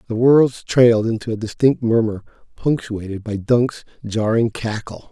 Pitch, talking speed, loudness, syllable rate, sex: 115 Hz, 140 wpm, -18 LUFS, 4.8 syllables/s, male